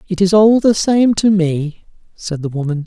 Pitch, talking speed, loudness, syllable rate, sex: 185 Hz, 210 wpm, -14 LUFS, 4.6 syllables/s, male